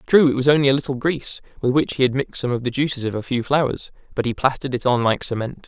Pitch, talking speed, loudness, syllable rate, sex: 130 Hz, 285 wpm, -20 LUFS, 7.1 syllables/s, male